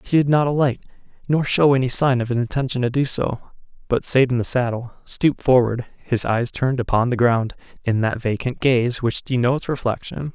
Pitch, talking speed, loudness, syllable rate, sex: 125 Hz, 195 wpm, -20 LUFS, 5.5 syllables/s, male